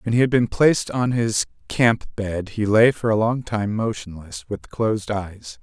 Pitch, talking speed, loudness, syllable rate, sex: 110 Hz, 205 wpm, -21 LUFS, 4.4 syllables/s, male